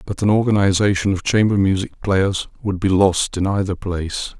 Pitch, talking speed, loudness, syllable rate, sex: 95 Hz, 175 wpm, -18 LUFS, 5.1 syllables/s, male